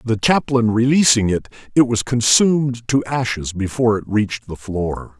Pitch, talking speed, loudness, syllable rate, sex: 115 Hz, 160 wpm, -18 LUFS, 4.8 syllables/s, male